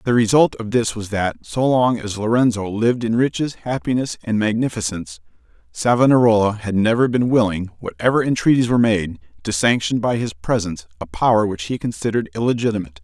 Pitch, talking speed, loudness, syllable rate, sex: 110 Hz, 165 wpm, -19 LUFS, 5.9 syllables/s, male